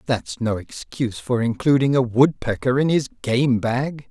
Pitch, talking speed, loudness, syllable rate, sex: 125 Hz, 160 wpm, -21 LUFS, 4.4 syllables/s, male